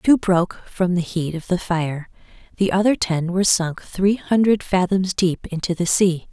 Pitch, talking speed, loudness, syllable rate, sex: 180 Hz, 190 wpm, -20 LUFS, 4.5 syllables/s, female